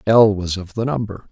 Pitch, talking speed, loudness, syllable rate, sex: 105 Hz, 180 wpm, -19 LUFS, 5.1 syllables/s, male